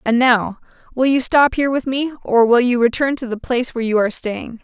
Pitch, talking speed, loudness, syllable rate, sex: 245 Hz, 245 wpm, -17 LUFS, 5.9 syllables/s, female